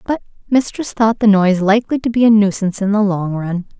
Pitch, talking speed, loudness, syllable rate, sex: 210 Hz, 220 wpm, -15 LUFS, 6.1 syllables/s, female